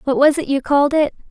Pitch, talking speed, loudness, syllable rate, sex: 285 Hz, 275 wpm, -16 LUFS, 6.7 syllables/s, female